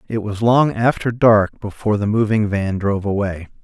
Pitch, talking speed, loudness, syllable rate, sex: 105 Hz, 180 wpm, -18 LUFS, 5.1 syllables/s, male